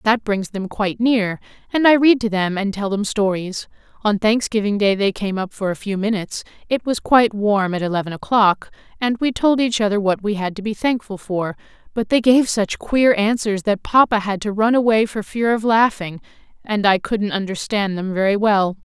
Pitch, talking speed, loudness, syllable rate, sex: 210 Hz, 210 wpm, -19 LUFS, 5.1 syllables/s, female